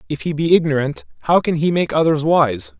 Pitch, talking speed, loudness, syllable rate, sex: 155 Hz, 215 wpm, -17 LUFS, 5.5 syllables/s, male